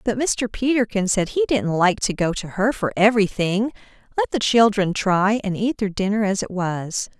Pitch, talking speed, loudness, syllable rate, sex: 210 Hz, 200 wpm, -21 LUFS, 4.8 syllables/s, female